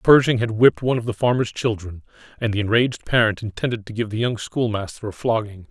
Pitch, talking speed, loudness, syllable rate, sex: 110 Hz, 210 wpm, -21 LUFS, 6.3 syllables/s, male